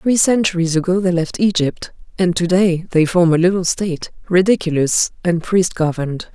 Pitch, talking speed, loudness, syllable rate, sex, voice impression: 175 Hz, 170 wpm, -16 LUFS, 5.1 syllables/s, female, very feminine, very adult-like, slightly middle-aged, very thin, relaxed, very weak, slightly bright, very soft, clear, very fluent, raspy, very cute, very intellectual, refreshing, very sincere, very calm, very friendly, very reassuring, very unique, very elegant, slightly wild, very sweet, slightly lively, very kind, very modest, light